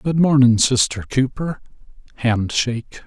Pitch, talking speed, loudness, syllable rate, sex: 125 Hz, 80 wpm, -18 LUFS, 4.7 syllables/s, male